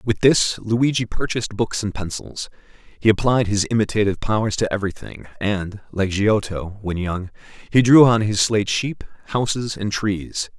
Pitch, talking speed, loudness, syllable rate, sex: 105 Hz, 160 wpm, -20 LUFS, 4.8 syllables/s, male